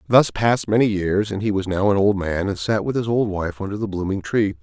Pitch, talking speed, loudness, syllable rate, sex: 100 Hz, 275 wpm, -21 LUFS, 5.8 syllables/s, male